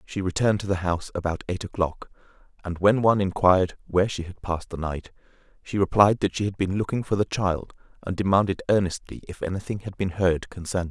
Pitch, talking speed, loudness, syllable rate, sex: 95 Hz, 210 wpm, -25 LUFS, 6.2 syllables/s, male